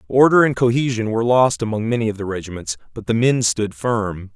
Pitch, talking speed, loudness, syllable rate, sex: 115 Hz, 205 wpm, -19 LUFS, 5.7 syllables/s, male